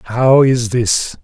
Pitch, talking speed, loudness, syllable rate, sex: 120 Hz, 145 wpm, -13 LUFS, 2.9 syllables/s, male